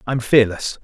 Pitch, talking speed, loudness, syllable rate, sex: 120 Hz, 215 wpm, -17 LUFS, 5.8 syllables/s, male